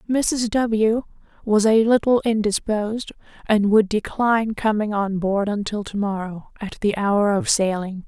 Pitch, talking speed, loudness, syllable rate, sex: 210 Hz, 150 wpm, -20 LUFS, 4.2 syllables/s, female